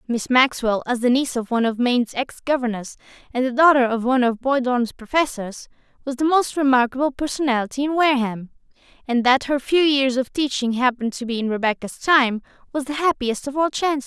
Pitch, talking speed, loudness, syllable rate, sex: 255 Hz, 190 wpm, -20 LUFS, 5.8 syllables/s, female